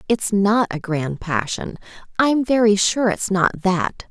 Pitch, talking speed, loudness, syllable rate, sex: 200 Hz, 160 wpm, -19 LUFS, 3.9 syllables/s, female